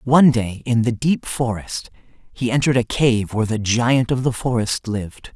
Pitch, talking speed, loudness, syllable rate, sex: 120 Hz, 190 wpm, -19 LUFS, 4.7 syllables/s, male